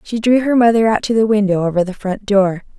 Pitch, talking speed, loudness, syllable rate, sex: 210 Hz, 260 wpm, -15 LUFS, 5.8 syllables/s, female